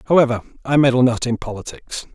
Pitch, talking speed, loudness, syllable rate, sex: 125 Hz, 170 wpm, -18 LUFS, 6.6 syllables/s, male